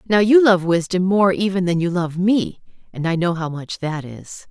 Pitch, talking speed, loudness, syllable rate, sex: 180 Hz, 225 wpm, -18 LUFS, 4.8 syllables/s, female